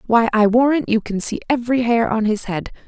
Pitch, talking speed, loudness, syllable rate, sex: 230 Hz, 230 wpm, -18 LUFS, 5.8 syllables/s, female